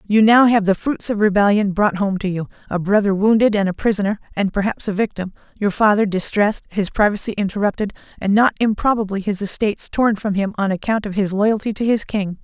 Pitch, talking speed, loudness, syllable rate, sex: 205 Hz, 210 wpm, -18 LUFS, 5.9 syllables/s, female